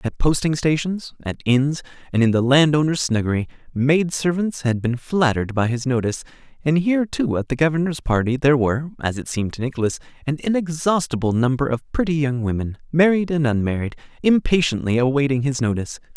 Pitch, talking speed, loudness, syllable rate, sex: 140 Hz, 165 wpm, -20 LUFS, 5.5 syllables/s, male